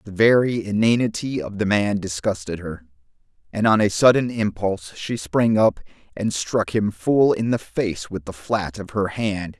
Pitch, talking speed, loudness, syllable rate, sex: 105 Hz, 180 wpm, -21 LUFS, 4.5 syllables/s, male